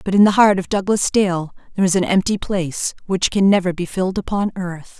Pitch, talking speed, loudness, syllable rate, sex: 190 Hz, 230 wpm, -18 LUFS, 5.8 syllables/s, female